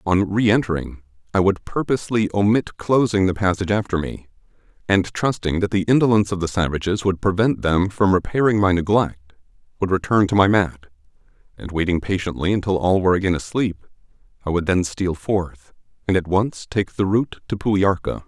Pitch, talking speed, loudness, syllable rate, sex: 95 Hz, 175 wpm, -20 LUFS, 5.6 syllables/s, male